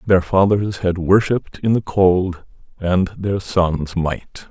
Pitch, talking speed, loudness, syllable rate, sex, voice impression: 95 Hz, 145 wpm, -18 LUFS, 3.5 syllables/s, male, masculine, slightly old, slightly weak, slightly dark, slightly hard, clear, slightly intellectual, sincere, mature, slightly strict, modest